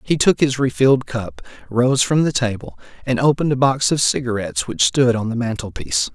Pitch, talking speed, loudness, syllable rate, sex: 125 Hz, 195 wpm, -18 LUFS, 5.7 syllables/s, male